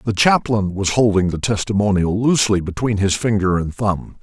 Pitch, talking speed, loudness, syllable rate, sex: 105 Hz, 170 wpm, -18 LUFS, 5.2 syllables/s, male